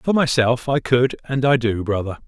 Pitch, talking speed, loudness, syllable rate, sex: 125 Hz, 210 wpm, -19 LUFS, 4.7 syllables/s, male